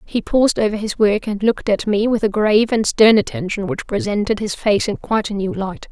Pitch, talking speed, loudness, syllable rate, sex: 205 Hz, 245 wpm, -18 LUFS, 5.7 syllables/s, female